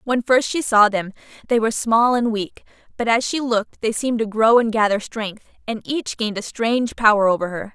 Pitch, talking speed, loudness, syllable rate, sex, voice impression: 225 Hz, 225 wpm, -19 LUFS, 5.5 syllables/s, female, feminine, adult-like, tensed, powerful, bright, clear, fluent, intellectual, friendly, slightly unique, lively, slightly light